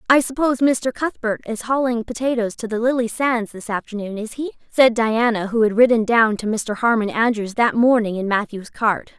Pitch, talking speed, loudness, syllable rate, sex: 230 Hz, 195 wpm, -19 LUFS, 5.1 syllables/s, female